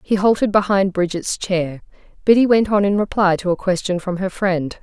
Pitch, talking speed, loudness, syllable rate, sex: 190 Hz, 200 wpm, -18 LUFS, 5.1 syllables/s, female